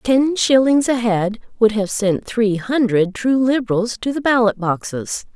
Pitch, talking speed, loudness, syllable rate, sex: 230 Hz, 170 wpm, -18 LUFS, 4.2 syllables/s, female